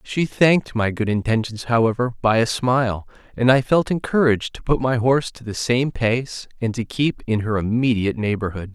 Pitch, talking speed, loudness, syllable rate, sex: 120 Hz, 190 wpm, -20 LUFS, 5.3 syllables/s, male